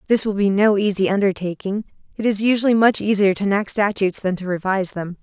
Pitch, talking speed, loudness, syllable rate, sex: 200 Hz, 205 wpm, -19 LUFS, 6.4 syllables/s, female